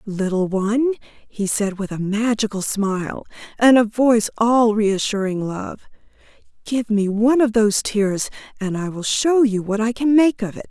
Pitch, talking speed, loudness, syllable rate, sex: 215 Hz, 175 wpm, -19 LUFS, 4.6 syllables/s, female